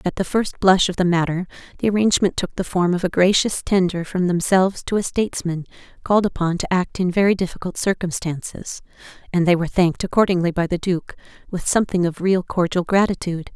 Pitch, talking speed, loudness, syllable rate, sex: 180 Hz, 185 wpm, -20 LUFS, 6.1 syllables/s, female